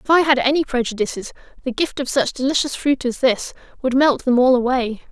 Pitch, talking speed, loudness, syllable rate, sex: 260 Hz, 210 wpm, -19 LUFS, 5.8 syllables/s, female